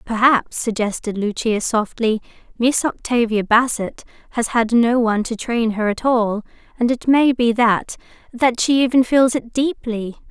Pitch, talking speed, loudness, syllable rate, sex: 235 Hz, 150 wpm, -18 LUFS, 4.4 syllables/s, female